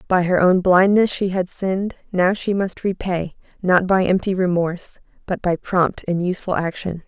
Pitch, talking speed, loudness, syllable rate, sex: 185 Hz, 180 wpm, -19 LUFS, 4.8 syllables/s, female